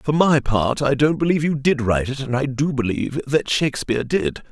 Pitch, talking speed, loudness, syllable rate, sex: 135 Hz, 225 wpm, -20 LUFS, 5.7 syllables/s, male